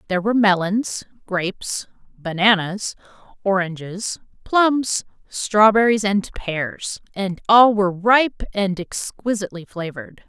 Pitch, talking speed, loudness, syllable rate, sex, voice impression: 200 Hz, 100 wpm, -20 LUFS, 4.1 syllables/s, female, feminine, adult-like, slightly powerful, clear, slightly friendly, slightly intense